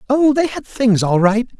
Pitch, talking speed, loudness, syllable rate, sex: 240 Hz, 225 wpm, -16 LUFS, 4.5 syllables/s, male